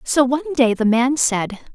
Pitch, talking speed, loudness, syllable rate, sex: 255 Hz, 205 wpm, -18 LUFS, 4.6 syllables/s, female